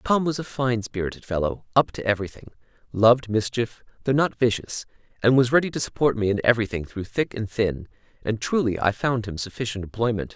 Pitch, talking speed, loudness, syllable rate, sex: 115 Hz, 190 wpm, -24 LUFS, 5.9 syllables/s, male